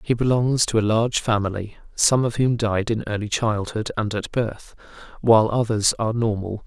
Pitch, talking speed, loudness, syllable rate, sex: 110 Hz, 180 wpm, -21 LUFS, 5.2 syllables/s, male